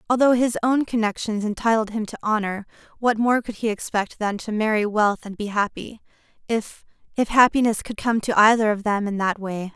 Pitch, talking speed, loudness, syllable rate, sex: 215 Hz, 190 wpm, -22 LUFS, 5.3 syllables/s, female